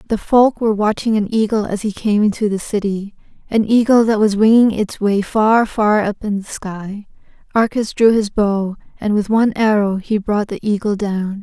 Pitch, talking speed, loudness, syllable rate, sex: 210 Hz, 200 wpm, -16 LUFS, 4.8 syllables/s, female